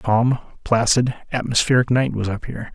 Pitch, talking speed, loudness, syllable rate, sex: 120 Hz, 155 wpm, -20 LUFS, 5.2 syllables/s, male